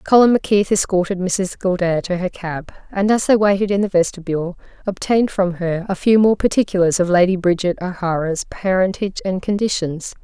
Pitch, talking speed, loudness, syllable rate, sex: 185 Hz, 170 wpm, -18 LUFS, 5.6 syllables/s, female